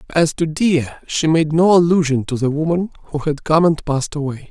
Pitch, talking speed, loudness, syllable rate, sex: 155 Hz, 215 wpm, -17 LUFS, 5.5 syllables/s, male